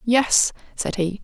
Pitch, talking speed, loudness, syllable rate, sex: 215 Hz, 145 wpm, -21 LUFS, 3.3 syllables/s, female